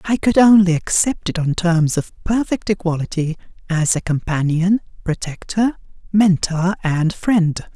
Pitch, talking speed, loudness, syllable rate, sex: 180 Hz, 130 wpm, -18 LUFS, 4.2 syllables/s, female